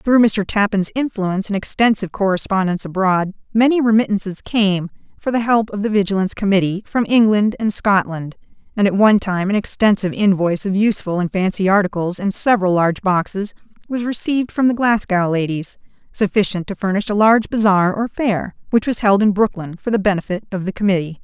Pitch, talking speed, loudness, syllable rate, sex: 200 Hz, 180 wpm, -17 LUFS, 5.9 syllables/s, female